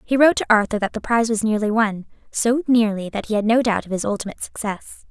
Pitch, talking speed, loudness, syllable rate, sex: 220 Hz, 245 wpm, -20 LUFS, 6.5 syllables/s, female